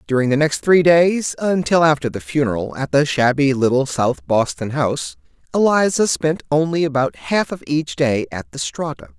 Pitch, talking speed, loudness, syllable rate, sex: 145 Hz, 175 wpm, -18 LUFS, 4.9 syllables/s, male